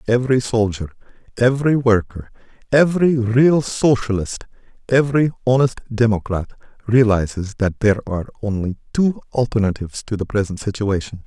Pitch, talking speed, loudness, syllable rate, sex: 115 Hz, 110 wpm, -18 LUFS, 5.5 syllables/s, male